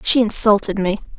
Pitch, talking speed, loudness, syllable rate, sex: 210 Hz, 150 wpm, -15 LUFS, 5.4 syllables/s, female